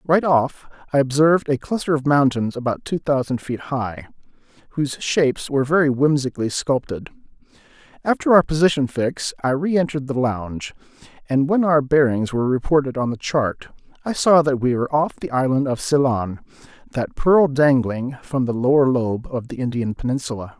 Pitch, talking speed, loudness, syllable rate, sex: 135 Hz, 165 wpm, -20 LUFS, 5.2 syllables/s, male